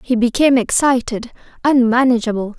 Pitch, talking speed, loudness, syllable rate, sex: 240 Hz, 95 wpm, -15 LUFS, 5.5 syllables/s, female